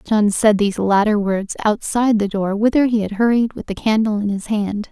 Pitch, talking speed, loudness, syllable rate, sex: 210 Hz, 220 wpm, -18 LUFS, 5.3 syllables/s, female